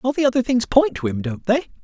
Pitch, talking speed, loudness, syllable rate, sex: 225 Hz, 295 wpm, -20 LUFS, 6.3 syllables/s, female